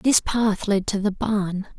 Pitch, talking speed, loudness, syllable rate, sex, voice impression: 205 Hz, 200 wpm, -22 LUFS, 3.6 syllables/s, female, gender-neutral, young, relaxed, soft, muffled, slightly raspy, calm, kind, modest, slightly light